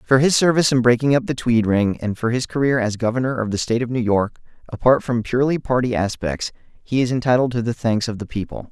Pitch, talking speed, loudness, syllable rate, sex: 120 Hz, 240 wpm, -19 LUFS, 6.2 syllables/s, male